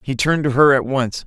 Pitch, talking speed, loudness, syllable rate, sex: 135 Hz, 285 wpm, -16 LUFS, 6.0 syllables/s, male